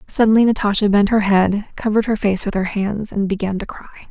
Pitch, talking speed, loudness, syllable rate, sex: 205 Hz, 220 wpm, -17 LUFS, 5.7 syllables/s, female